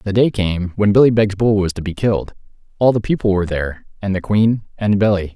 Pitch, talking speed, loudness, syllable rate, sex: 100 Hz, 235 wpm, -17 LUFS, 6.1 syllables/s, male